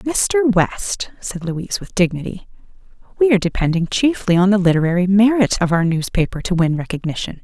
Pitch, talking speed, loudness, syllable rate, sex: 190 Hz, 160 wpm, -17 LUFS, 5.7 syllables/s, female